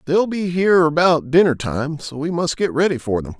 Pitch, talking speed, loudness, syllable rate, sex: 155 Hz, 230 wpm, -18 LUFS, 5.3 syllables/s, male